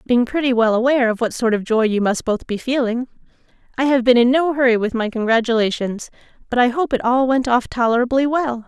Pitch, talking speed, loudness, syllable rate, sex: 240 Hz, 220 wpm, -18 LUFS, 5.9 syllables/s, female